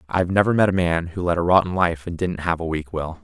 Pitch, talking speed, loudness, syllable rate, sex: 85 Hz, 295 wpm, -21 LUFS, 6.3 syllables/s, male